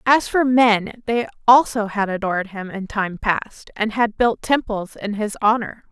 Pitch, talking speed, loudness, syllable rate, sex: 215 Hz, 180 wpm, -19 LUFS, 4.2 syllables/s, female